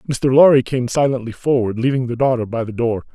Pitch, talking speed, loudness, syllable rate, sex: 125 Hz, 210 wpm, -17 LUFS, 5.9 syllables/s, male